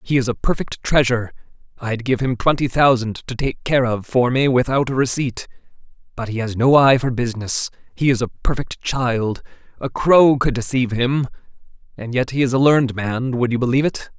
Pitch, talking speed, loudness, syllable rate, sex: 125 Hz, 200 wpm, -19 LUFS, 5.4 syllables/s, male